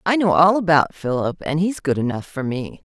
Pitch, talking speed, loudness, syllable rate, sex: 160 Hz, 230 wpm, -19 LUFS, 5.3 syllables/s, female